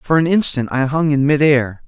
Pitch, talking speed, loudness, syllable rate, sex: 145 Hz, 255 wpm, -15 LUFS, 5.0 syllables/s, male